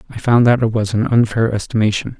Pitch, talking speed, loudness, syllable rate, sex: 110 Hz, 220 wpm, -16 LUFS, 6.0 syllables/s, male